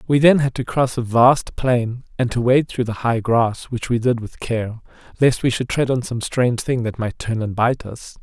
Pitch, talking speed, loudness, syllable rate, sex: 120 Hz, 250 wpm, -19 LUFS, 4.7 syllables/s, male